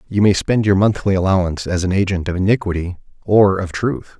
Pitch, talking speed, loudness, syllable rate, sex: 95 Hz, 200 wpm, -17 LUFS, 5.9 syllables/s, male